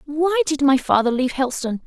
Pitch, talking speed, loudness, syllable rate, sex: 270 Hz, 195 wpm, -19 LUFS, 6.1 syllables/s, female